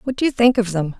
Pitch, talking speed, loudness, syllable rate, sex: 220 Hz, 365 wpm, -18 LUFS, 6.9 syllables/s, female